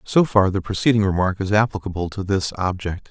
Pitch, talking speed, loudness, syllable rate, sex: 100 Hz, 195 wpm, -20 LUFS, 5.7 syllables/s, male